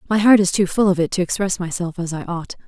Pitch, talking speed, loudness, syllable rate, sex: 185 Hz, 290 wpm, -19 LUFS, 6.3 syllables/s, female